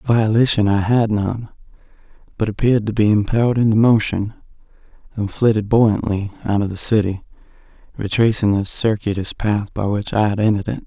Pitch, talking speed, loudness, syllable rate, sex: 105 Hz, 155 wpm, -18 LUFS, 5.4 syllables/s, male